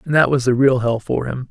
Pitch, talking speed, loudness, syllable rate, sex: 125 Hz, 320 wpm, -17 LUFS, 5.7 syllables/s, male